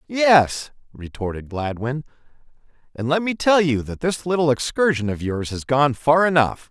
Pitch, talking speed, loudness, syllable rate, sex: 140 Hz, 160 wpm, -20 LUFS, 4.6 syllables/s, male